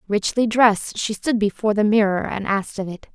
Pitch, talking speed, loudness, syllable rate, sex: 210 Hz, 210 wpm, -20 LUFS, 5.8 syllables/s, female